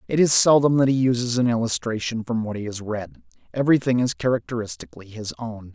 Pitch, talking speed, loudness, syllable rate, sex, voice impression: 120 Hz, 190 wpm, -21 LUFS, 6.2 syllables/s, male, masculine, adult-like, tensed, powerful, bright, slightly muffled, slightly raspy, intellectual, friendly, reassuring, wild, lively, kind, slightly light